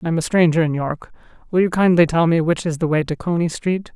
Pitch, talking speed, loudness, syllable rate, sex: 165 Hz, 275 wpm, -18 LUFS, 6.1 syllables/s, female